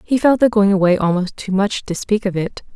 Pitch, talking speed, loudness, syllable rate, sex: 200 Hz, 260 wpm, -17 LUFS, 5.5 syllables/s, female